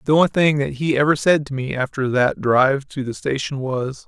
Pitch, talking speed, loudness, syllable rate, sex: 140 Hz, 235 wpm, -19 LUFS, 5.3 syllables/s, male